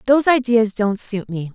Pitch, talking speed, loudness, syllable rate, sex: 225 Hz, 195 wpm, -18 LUFS, 5.0 syllables/s, female